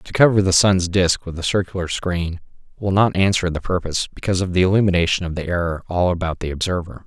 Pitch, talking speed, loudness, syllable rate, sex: 90 Hz, 210 wpm, -19 LUFS, 6.1 syllables/s, male